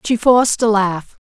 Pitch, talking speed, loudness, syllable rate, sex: 215 Hz, 190 wpm, -15 LUFS, 4.6 syllables/s, female